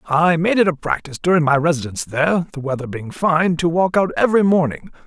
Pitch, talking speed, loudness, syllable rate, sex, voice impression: 160 Hz, 215 wpm, -18 LUFS, 6.2 syllables/s, male, masculine, middle-aged, powerful, slightly bright, muffled, raspy, mature, friendly, wild, lively, slightly strict, intense